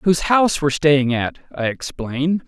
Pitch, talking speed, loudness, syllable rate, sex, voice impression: 150 Hz, 170 wpm, -19 LUFS, 5.6 syllables/s, male, slightly masculine, adult-like, tensed, clear, refreshing, friendly, lively